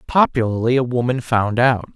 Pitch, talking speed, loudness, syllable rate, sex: 120 Hz, 155 wpm, -18 LUFS, 5.2 syllables/s, male